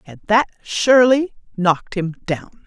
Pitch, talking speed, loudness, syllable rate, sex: 205 Hz, 135 wpm, -18 LUFS, 3.8 syllables/s, female